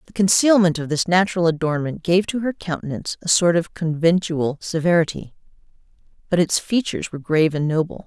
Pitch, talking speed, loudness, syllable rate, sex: 170 Hz, 165 wpm, -20 LUFS, 5.9 syllables/s, female